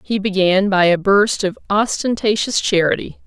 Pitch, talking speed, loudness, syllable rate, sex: 200 Hz, 145 wpm, -16 LUFS, 4.6 syllables/s, female